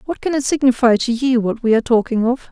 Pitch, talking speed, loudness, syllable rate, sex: 245 Hz, 265 wpm, -16 LUFS, 6.3 syllables/s, female